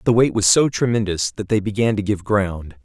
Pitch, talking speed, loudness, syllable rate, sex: 100 Hz, 255 wpm, -19 LUFS, 5.5 syllables/s, male